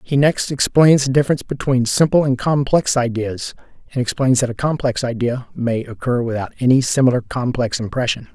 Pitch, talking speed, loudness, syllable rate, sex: 125 Hz, 165 wpm, -18 LUFS, 5.4 syllables/s, male